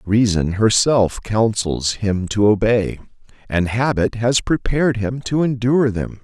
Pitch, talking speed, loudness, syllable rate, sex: 110 Hz, 135 wpm, -18 LUFS, 4.1 syllables/s, male